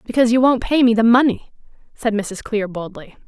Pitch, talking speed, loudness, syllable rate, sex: 225 Hz, 200 wpm, -17 LUFS, 5.6 syllables/s, female